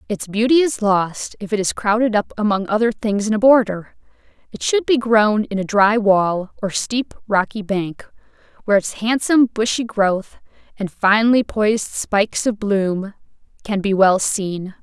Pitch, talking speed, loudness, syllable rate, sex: 210 Hz, 170 wpm, -18 LUFS, 4.5 syllables/s, female